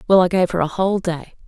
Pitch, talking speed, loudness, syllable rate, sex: 180 Hz, 285 wpm, -18 LUFS, 6.6 syllables/s, female